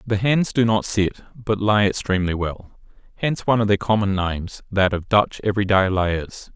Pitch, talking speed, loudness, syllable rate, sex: 105 Hz, 190 wpm, -20 LUFS, 5.1 syllables/s, male